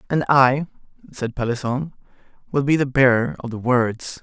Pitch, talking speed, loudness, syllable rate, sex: 130 Hz, 155 wpm, -20 LUFS, 4.8 syllables/s, male